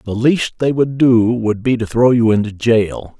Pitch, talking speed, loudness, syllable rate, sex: 115 Hz, 225 wpm, -15 LUFS, 4.3 syllables/s, male